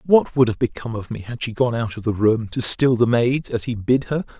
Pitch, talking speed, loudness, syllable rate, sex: 120 Hz, 285 wpm, -20 LUFS, 5.5 syllables/s, male